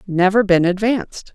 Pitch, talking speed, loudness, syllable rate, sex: 195 Hz, 135 wpm, -16 LUFS, 5.0 syllables/s, female